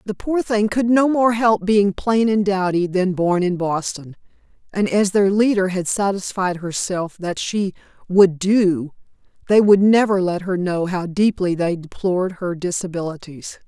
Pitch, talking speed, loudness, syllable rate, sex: 190 Hz, 165 wpm, -19 LUFS, 4.4 syllables/s, female